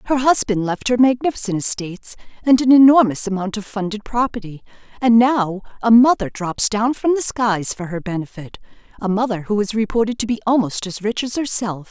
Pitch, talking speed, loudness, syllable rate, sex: 220 Hz, 180 wpm, -18 LUFS, 5.5 syllables/s, female